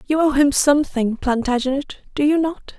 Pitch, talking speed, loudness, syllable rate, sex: 280 Hz, 170 wpm, -19 LUFS, 5.3 syllables/s, female